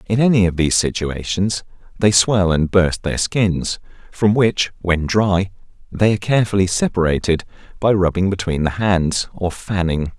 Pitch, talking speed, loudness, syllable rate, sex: 95 Hz, 155 wpm, -18 LUFS, 4.7 syllables/s, male